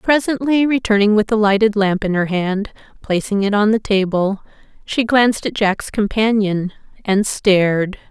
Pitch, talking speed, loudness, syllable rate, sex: 210 Hz, 150 wpm, -17 LUFS, 4.6 syllables/s, female